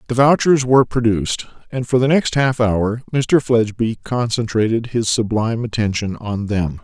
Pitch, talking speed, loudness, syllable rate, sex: 115 Hz, 160 wpm, -18 LUFS, 5.0 syllables/s, male